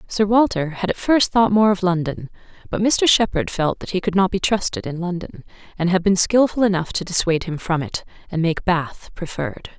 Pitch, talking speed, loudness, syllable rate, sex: 185 Hz, 215 wpm, -19 LUFS, 5.4 syllables/s, female